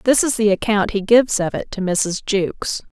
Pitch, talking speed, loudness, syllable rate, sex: 210 Hz, 225 wpm, -18 LUFS, 5.2 syllables/s, female